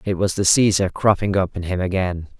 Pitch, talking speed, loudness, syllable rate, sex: 95 Hz, 225 wpm, -19 LUFS, 5.4 syllables/s, male